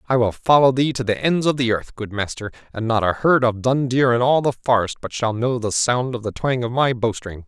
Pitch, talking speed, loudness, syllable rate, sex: 120 Hz, 275 wpm, -20 LUFS, 5.4 syllables/s, male